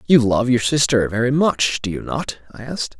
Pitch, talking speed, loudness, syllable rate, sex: 125 Hz, 220 wpm, -18 LUFS, 5.2 syllables/s, male